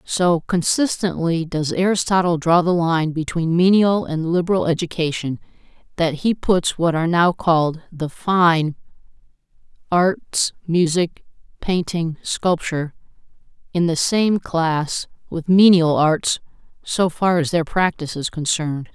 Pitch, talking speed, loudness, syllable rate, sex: 170 Hz, 125 wpm, -19 LUFS, 4.2 syllables/s, female